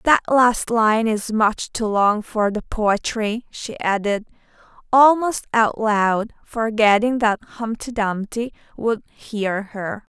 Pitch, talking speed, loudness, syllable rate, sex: 220 Hz, 130 wpm, -20 LUFS, 3.4 syllables/s, female